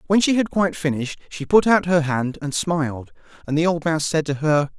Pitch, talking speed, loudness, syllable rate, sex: 160 Hz, 240 wpm, -20 LUFS, 5.8 syllables/s, male